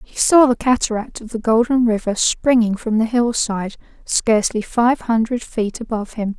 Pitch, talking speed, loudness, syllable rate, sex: 230 Hz, 170 wpm, -18 LUFS, 5.0 syllables/s, female